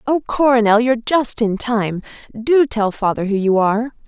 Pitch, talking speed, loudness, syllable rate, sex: 230 Hz, 175 wpm, -17 LUFS, 4.9 syllables/s, female